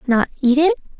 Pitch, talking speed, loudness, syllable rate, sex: 280 Hz, 180 wpm, -17 LUFS, 6.1 syllables/s, female